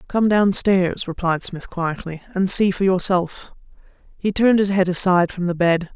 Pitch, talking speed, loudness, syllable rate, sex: 185 Hz, 170 wpm, -19 LUFS, 4.8 syllables/s, female